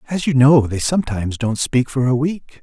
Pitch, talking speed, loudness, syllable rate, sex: 135 Hz, 230 wpm, -17 LUFS, 5.4 syllables/s, male